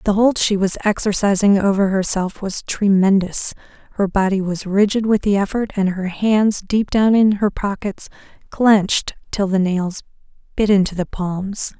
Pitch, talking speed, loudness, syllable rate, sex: 200 Hz, 165 wpm, -18 LUFS, 4.6 syllables/s, female